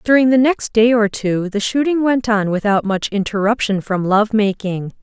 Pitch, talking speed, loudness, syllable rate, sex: 215 Hz, 190 wpm, -16 LUFS, 4.7 syllables/s, female